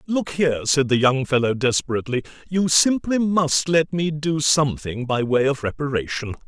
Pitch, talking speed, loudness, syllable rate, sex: 145 Hz, 165 wpm, -20 LUFS, 5.1 syllables/s, male